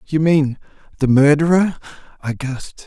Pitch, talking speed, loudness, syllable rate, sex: 145 Hz, 105 wpm, -17 LUFS, 4.8 syllables/s, male